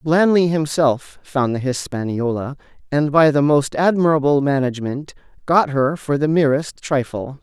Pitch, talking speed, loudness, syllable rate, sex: 145 Hz, 135 wpm, -18 LUFS, 4.5 syllables/s, male